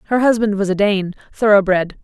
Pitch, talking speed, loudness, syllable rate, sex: 205 Hz, 175 wpm, -16 LUFS, 5.6 syllables/s, female